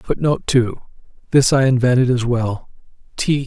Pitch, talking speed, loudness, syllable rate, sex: 125 Hz, 120 wpm, -17 LUFS, 4.9 syllables/s, male